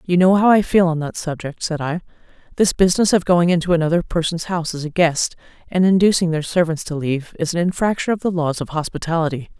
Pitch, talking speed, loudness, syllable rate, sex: 170 Hz, 220 wpm, -18 LUFS, 6.2 syllables/s, female